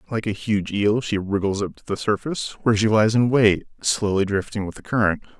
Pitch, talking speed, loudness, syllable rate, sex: 105 Hz, 220 wpm, -21 LUFS, 5.7 syllables/s, male